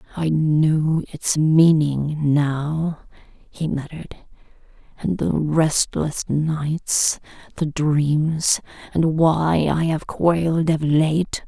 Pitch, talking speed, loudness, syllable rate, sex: 155 Hz, 105 wpm, -20 LUFS, 2.7 syllables/s, female